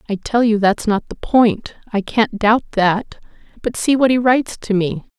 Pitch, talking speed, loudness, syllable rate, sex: 220 Hz, 195 wpm, -17 LUFS, 4.6 syllables/s, female